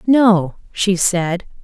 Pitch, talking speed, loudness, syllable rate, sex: 190 Hz, 110 wpm, -16 LUFS, 2.4 syllables/s, female